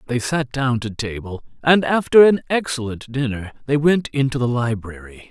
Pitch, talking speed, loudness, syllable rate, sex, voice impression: 130 Hz, 170 wpm, -19 LUFS, 4.9 syllables/s, male, masculine, slightly middle-aged, slightly relaxed, slightly weak, soft, slightly muffled, slightly sincere, calm, slightly mature, kind, modest